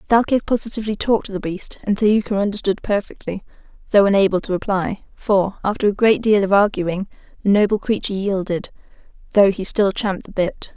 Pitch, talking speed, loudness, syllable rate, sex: 200 Hz, 175 wpm, -19 LUFS, 6.0 syllables/s, female